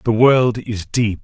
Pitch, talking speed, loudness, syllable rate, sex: 110 Hz, 195 wpm, -16 LUFS, 3.6 syllables/s, male